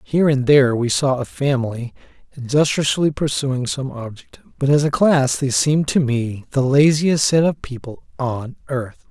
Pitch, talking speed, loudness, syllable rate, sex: 135 Hz, 170 wpm, -18 LUFS, 4.8 syllables/s, male